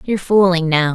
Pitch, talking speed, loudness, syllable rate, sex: 175 Hz, 190 wpm, -15 LUFS, 5.9 syllables/s, female